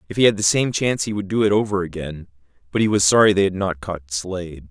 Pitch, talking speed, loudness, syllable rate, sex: 95 Hz, 270 wpm, -19 LUFS, 6.5 syllables/s, male